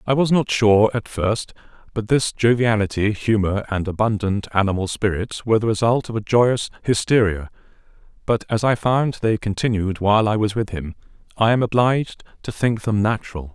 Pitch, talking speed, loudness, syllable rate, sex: 110 Hz, 175 wpm, -20 LUFS, 5.2 syllables/s, male